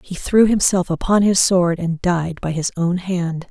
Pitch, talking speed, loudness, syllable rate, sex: 180 Hz, 205 wpm, -18 LUFS, 4.2 syllables/s, female